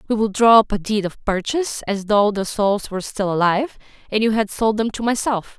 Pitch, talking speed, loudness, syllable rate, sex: 210 Hz, 235 wpm, -19 LUFS, 5.5 syllables/s, female